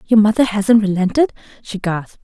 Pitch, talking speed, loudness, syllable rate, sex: 210 Hz, 160 wpm, -16 LUFS, 5.6 syllables/s, female